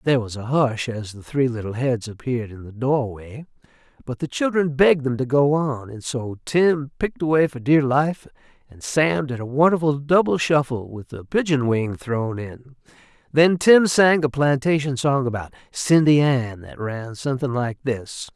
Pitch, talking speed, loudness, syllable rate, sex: 135 Hz, 185 wpm, -21 LUFS, 4.7 syllables/s, male